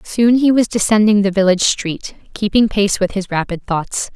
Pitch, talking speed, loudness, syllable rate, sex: 205 Hz, 190 wpm, -15 LUFS, 4.9 syllables/s, female